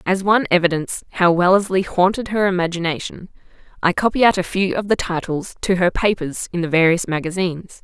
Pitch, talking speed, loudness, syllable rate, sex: 180 Hz, 175 wpm, -18 LUFS, 5.9 syllables/s, female